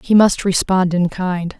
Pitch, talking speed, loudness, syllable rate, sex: 185 Hz, 190 wpm, -16 LUFS, 4.0 syllables/s, female